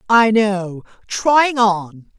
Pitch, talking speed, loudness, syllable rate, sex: 210 Hz, 80 wpm, -16 LUFS, 2.3 syllables/s, female